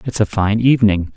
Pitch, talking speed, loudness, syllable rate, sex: 110 Hz, 205 wpm, -15 LUFS, 5.9 syllables/s, male